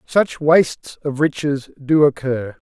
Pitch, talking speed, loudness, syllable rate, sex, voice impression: 145 Hz, 135 wpm, -18 LUFS, 3.8 syllables/s, male, very masculine, very adult-like, old, thick, slightly relaxed, slightly weak, very bright, soft, clear, very fluent, slightly raspy, very cool, intellectual, slightly refreshing, very sincere, very calm, very friendly, reassuring, very unique, elegant, slightly wild, slightly sweet, very lively, very kind, slightly intense, slightly light